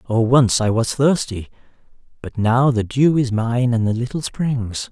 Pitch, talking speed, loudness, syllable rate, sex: 120 Hz, 185 wpm, -18 LUFS, 4.2 syllables/s, male